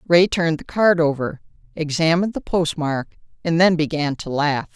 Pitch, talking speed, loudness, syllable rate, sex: 160 Hz, 165 wpm, -20 LUFS, 5.1 syllables/s, female